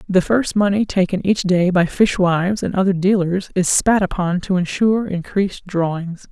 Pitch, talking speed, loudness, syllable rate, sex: 190 Hz, 170 wpm, -18 LUFS, 4.9 syllables/s, female